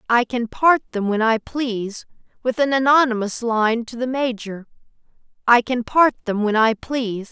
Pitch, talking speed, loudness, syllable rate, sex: 235 Hz, 170 wpm, -19 LUFS, 4.6 syllables/s, female